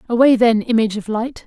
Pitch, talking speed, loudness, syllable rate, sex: 230 Hz, 205 wpm, -16 LUFS, 6.2 syllables/s, female